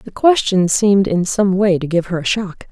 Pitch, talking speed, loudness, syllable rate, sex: 190 Hz, 245 wpm, -15 LUFS, 4.9 syllables/s, female